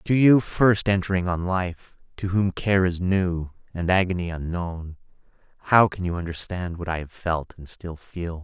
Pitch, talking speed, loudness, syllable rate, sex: 90 Hz, 180 wpm, -23 LUFS, 4.5 syllables/s, male